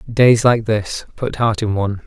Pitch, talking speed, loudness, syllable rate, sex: 110 Hz, 205 wpm, -17 LUFS, 4.4 syllables/s, male